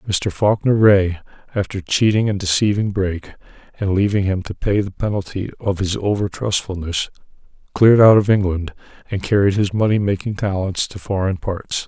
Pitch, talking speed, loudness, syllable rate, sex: 100 Hz, 160 wpm, -18 LUFS, 5.3 syllables/s, male